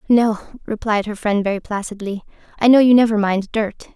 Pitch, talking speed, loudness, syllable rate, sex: 215 Hz, 180 wpm, -18 LUFS, 5.6 syllables/s, female